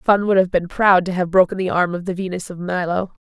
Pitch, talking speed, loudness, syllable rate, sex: 180 Hz, 280 wpm, -18 LUFS, 5.7 syllables/s, female